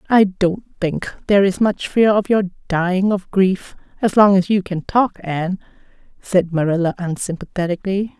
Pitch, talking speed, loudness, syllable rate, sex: 190 Hz, 160 wpm, -18 LUFS, 4.7 syllables/s, female